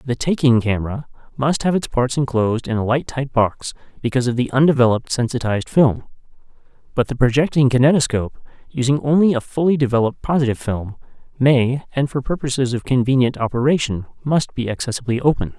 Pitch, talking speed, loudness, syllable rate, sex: 130 Hz, 160 wpm, -18 LUFS, 6.2 syllables/s, male